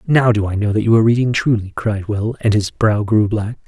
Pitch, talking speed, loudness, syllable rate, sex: 110 Hz, 260 wpm, -16 LUFS, 5.6 syllables/s, male